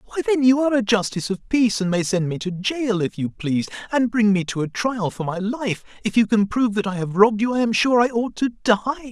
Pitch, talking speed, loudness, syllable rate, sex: 215 Hz, 275 wpm, -21 LUFS, 6.1 syllables/s, male